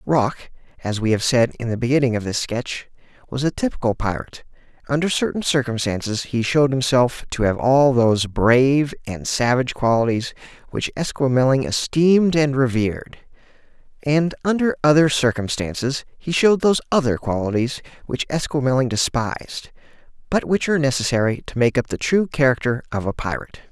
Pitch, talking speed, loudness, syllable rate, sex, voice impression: 130 Hz, 150 wpm, -20 LUFS, 5.5 syllables/s, male, very masculine, slightly adult-like, slightly thick, slightly tensed, slightly powerful, bright, soft, clear, fluent, cool, intellectual, very refreshing, sincere, calm, slightly mature, very friendly, very reassuring, slightly unique, slightly elegant, wild, sweet, lively, very kind, slightly modest